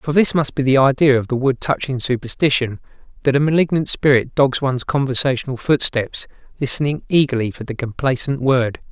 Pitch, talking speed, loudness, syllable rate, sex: 135 Hz, 170 wpm, -18 LUFS, 5.6 syllables/s, male